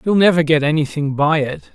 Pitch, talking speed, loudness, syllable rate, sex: 155 Hz, 205 wpm, -16 LUFS, 5.5 syllables/s, male